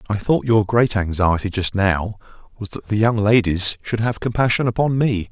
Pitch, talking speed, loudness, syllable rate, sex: 105 Hz, 190 wpm, -18 LUFS, 4.9 syllables/s, male